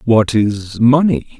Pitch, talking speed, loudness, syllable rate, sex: 115 Hz, 130 wpm, -14 LUFS, 3.4 syllables/s, male